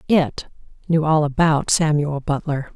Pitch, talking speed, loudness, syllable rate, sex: 155 Hz, 130 wpm, -19 LUFS, 4.1 syllables/s, female